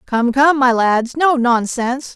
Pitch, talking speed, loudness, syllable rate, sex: 255 Hz, 165 wpm, -15 LUFS, 4.1 syllables/s, female